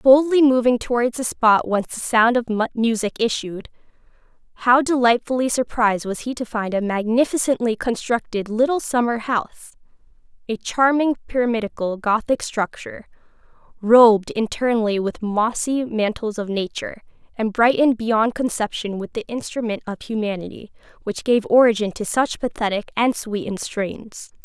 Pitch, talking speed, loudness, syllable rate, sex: 230 Hz, 135 wpm, -20 LUFS, 4.9 syllables/s, female